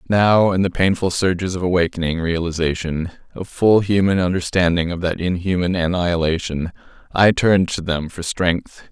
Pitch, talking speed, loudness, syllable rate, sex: 90 Hz, 150 wpm, -19 LUFS, 5.1 syllables/s, male